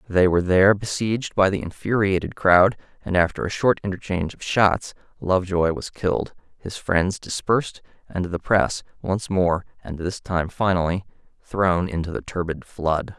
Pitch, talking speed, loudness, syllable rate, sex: 95 Hz, 150 wpm, -22 LUFS, 4.9 syllables/s, male